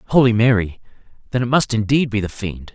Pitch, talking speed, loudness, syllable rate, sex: 115 Hz, 195 wpm, -18 LUFS, 5.9 syllables/s, male